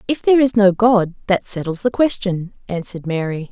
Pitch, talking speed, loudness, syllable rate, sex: 200 Hz, 190 wpm, -18 LUFS, 5.5 syllables/s, female